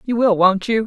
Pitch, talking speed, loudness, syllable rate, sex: 215 Hz, 275 wpm, -16 LUFS, 5.2 syllables/s, female